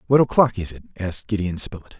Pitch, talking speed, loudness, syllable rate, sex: 100 Hz, 210 wpm, -22 LUFS, 6.9 syllables/s, male